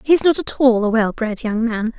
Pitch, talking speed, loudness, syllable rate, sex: 235 Hz, 305 wpm, -17 LUFS, 5.7 syllables/s, female